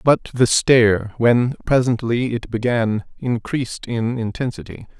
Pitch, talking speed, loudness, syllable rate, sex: 120 Hz, 120 wpm, -19 LUFS, 4.2 syllables/s, male